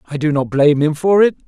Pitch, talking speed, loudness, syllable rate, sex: 155 Hz, 285 wpm, -15 LUFS, 6.3 syllables/s, male